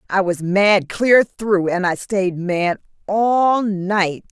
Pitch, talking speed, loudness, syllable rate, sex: 195 Hz, 155 wpm, -18 LUFS, 2.9 syllables/s, female